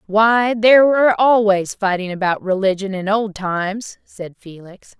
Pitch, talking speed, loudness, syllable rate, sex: 205 Hz, 145 wpm, -16 LUFS, 4.2 syllables/s, female